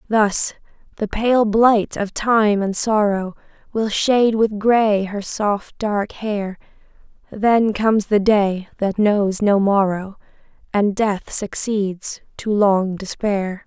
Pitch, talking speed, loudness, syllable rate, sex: 205 Hz, 130 wpm, -19 LUFS, 3.3 syllables/s, female